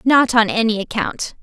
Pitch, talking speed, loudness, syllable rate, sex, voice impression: 230 Hz, 170 wpm, -17 LUFS, 4.7 syllables/s, female, feminine, adult-like, tensed, bright, clear, fluent, friendly, lively, light